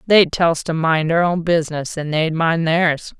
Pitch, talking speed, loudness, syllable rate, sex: 165 Hz, 225 wpm, -18 LUFS, 4.6 syllables/s, female